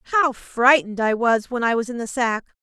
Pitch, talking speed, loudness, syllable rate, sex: 240 Hz, 230 wpm, -20 LUFS, 5.5 syllables/s, female